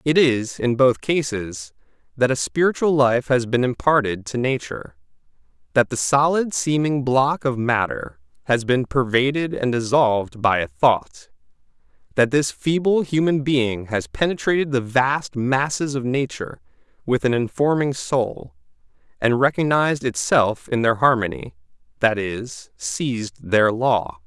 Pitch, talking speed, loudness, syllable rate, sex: 125 Hz, 140 wpm, -20 LUFS, 4.3 syllables/s, male